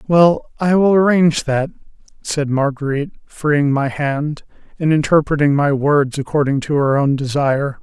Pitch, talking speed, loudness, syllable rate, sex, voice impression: 145 Hz, 145 wpm, -16 LUFS, 4.7 syllables/s, male, masculine, middle-aged, thick, slightly powerful, bright, soft, slightly muffled, intellectual, calm, friendly, reassuring, wild, kind